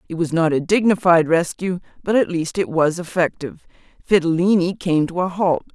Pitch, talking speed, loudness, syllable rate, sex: 175 Hz, 180 wpm, -19 LUFS, 5.4 syllables/s, female